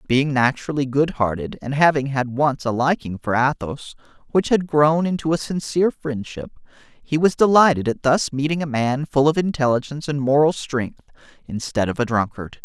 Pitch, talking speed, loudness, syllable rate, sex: 140 Hz, 170 wpm, -20 LUFS, 5.2 syllables/s, male